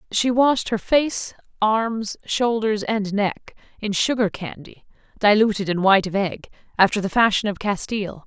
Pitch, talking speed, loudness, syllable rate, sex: 210 Hz, 150 wpm, -21 LUFS, 4.6 syllables/s, female